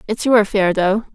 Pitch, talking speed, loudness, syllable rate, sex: 210 Hz, 210 wpm, -16 LUFS, 5.5 syllables/s, female